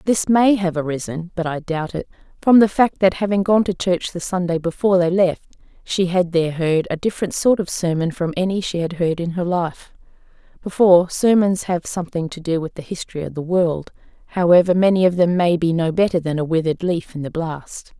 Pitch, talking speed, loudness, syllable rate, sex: 175 Hz, 210 wpm, -19 LUFS, 5.6 syllables/s, female